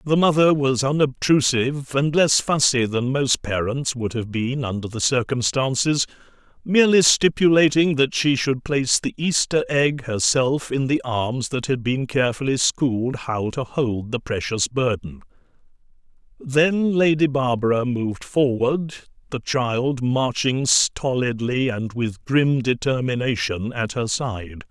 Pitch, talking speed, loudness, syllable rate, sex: 130 Hz, 135 wpm, -21 LUFS, 4.2 syllables/s, male